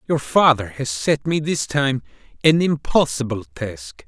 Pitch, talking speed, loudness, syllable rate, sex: 130 Hz, 145 wpm, -20 LUFS, 4.0 syllables/s, male